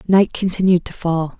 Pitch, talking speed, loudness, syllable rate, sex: 180 Hz, 170 wpm, -18 LUFS, 4.9 syllables/s, female